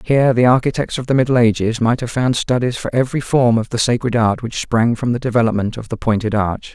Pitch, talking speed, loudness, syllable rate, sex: 120 Hz, 240 wpm, -17 LUFS, 6.0 syllables/s, male